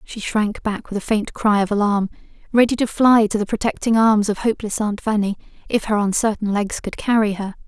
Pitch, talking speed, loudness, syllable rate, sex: 210 Hz, 210 wpm, -19 LUFS, 5.5 syllables/s, female